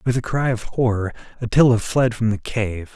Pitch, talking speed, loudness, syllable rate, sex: 115 Hz, 205 wpm, -20 LUFS, 5.1 syllables/s, male